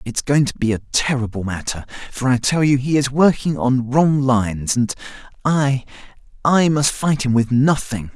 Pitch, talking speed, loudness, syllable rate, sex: 130 Hz, 185 wpm, -18 LUFS, 4.8 syllables/s, male